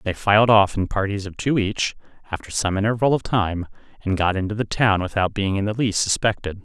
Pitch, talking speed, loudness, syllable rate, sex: 100 Hz, 215 wpm, -21 LUFS, 5.7 syllables/s, male